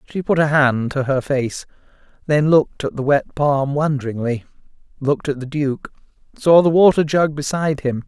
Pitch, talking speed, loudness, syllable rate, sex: 145 Hz, 180 wpm, -18 LUFS, 5.1 syllables/s, male